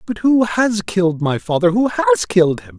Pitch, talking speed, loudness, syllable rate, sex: 180 Hz, 215 wpm, -16 LUFS, 4.9 syllables/s, male